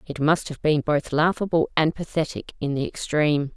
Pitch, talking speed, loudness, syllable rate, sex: 155 Hz, 185 wpm, -23 LUFS, 5.2 syllables/s, female